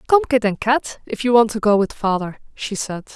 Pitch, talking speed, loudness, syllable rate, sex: 225 Hz, 245 wpm, -19 LUFS, 5.2 syllables/s, female